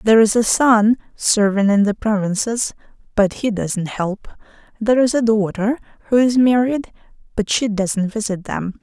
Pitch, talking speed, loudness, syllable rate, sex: 215 Hz, 165 wpm, -18 LUFS, 4.6 syllables/s, female